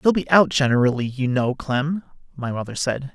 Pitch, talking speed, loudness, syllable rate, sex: 140 Hz, 190 wpm, -21 LUFS, 5.1 syllables/s, male